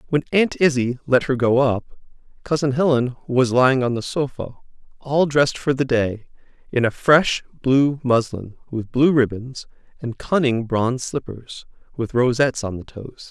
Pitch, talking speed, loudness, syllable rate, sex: 130 Hz, 160 wpm, -20 LUFS, 4.7 syllables/s, male